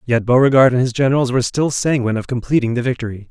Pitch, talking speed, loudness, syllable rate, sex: 125 Hz, 220 wpm, -16 LUFS, 7.2 syllables/s, male